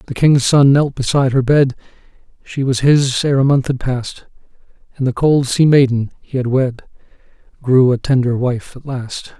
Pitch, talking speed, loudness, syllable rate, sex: 130 Hz, 185 wpm, -15 LUFS, 4.9 syllables/s, male